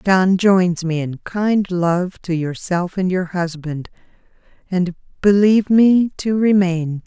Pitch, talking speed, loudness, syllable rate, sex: 180 Hz, 135 wpm, -17 LUFS, 3.5 syllables/s, female